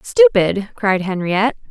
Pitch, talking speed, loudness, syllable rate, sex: 190 Hz, 105 wpm, -16 LUFS, 4.1 syllables/s, female